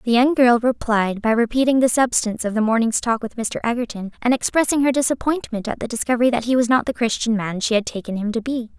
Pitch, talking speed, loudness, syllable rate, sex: 235 Hz, 240 wpm, -20 LUFS, 6.3 syllables/s, female